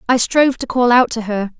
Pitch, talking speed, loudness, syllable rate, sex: 240 Hz, 265 wpm, -15 LUFS, 5.9 syllables/s, female